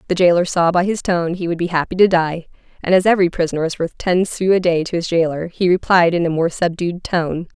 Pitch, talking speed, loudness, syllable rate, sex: 175 Hz, 255 wpm, -17 LUFS, 5.9 syllables/s, female